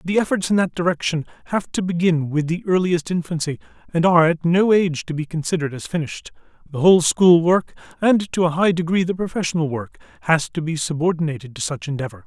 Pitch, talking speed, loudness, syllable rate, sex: 165 Hz, 200 wpm, -20 LUFS, 6.2 syllables/s, male